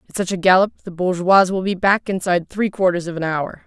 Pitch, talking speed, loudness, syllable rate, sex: 185 Hz, 245 wpm, -18 LUFS, 6.3 syllables/s, female